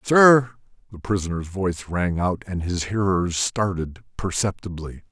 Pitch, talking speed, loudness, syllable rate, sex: 95 Hz, 115 wpm, -22 LUFS, 4.4 syllables/s, male